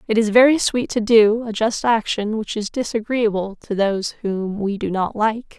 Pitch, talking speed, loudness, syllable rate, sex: 215 Hz, 205 wpm, -19 LUFS, 4.7 syllables/s, female